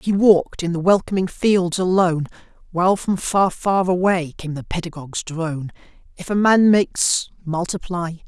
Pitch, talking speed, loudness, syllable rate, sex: 180 Hz, 150 wpm, -19 LUFS, 4.9 syllables/s, male